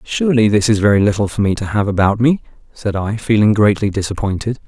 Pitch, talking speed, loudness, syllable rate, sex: 105 Hz, 205 wpm, -15 LUFS, 6.2 syllables/s, male